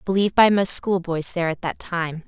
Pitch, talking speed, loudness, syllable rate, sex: 180 Hz, 210 wpm, -20 LUFS, 5.6 syllables/s, female